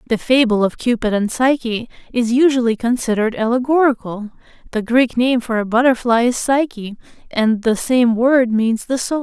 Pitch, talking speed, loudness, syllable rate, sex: 240 Hz, 165 wpm, -17 LUFS, 4.9 syllables/s, female